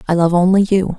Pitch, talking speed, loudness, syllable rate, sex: 180 Hz, 245 wpm, -14 LUFS, 6.0 syllables/s, female